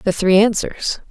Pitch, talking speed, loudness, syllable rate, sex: 200 Hz, 165 wpm, -16 LUFS, 4.1 syllables/s, female